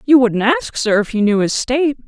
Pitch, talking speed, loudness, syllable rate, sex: 235 Hz, 260 wpm, -15 LUFS, 5.4 syllables/s, female